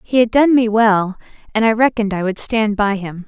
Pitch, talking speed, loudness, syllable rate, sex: 215 Hz, 240 wpm, -16 LUFS, 5.4 syllables/s, female